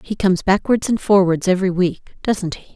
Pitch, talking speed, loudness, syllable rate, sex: 190 Hz, 175 wpm, -18 LUFS, 5.4 syllables/s, female